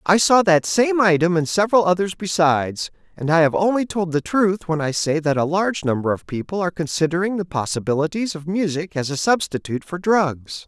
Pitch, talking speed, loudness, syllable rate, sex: 175 Hz, 200 wpm, -20 LUFS, 5.6 syllables/s, male